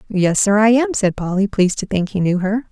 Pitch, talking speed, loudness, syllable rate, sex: 200 Hz, 265 wpm, -17 LUFS, 5.8 syllables/s, female